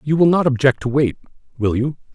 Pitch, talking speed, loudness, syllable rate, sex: 135 Hz, 225 wpm, -18 LUFS, 6.0 syllables/s, male